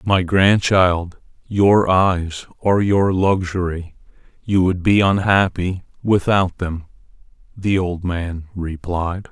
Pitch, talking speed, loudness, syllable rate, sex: 90 Hz, 110 wpm, -18 LUFS, 3.4 syllables/s, male